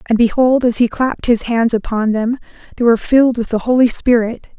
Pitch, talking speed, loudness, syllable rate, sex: 235 Hz, 210 wpm, -15 LUFS, 5.9 syllables/s, female